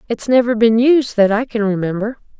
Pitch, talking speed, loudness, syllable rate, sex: 230 Hz, 200 wpm, -15 LUFS, 5.4 syllables/s, female